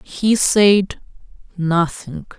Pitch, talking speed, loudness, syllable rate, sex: 185 Hz, 75 wpm, -16 LUFS, 2.3 syllables/s, female